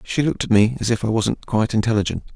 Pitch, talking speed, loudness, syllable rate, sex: 110 Hz, 255 wpm, -20 LUFS, 6.9 syllables/s, male